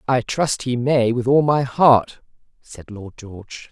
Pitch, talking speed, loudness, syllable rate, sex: 125 Hz, 180 wpm, -18 LUFS, 3.8 syllables/s, female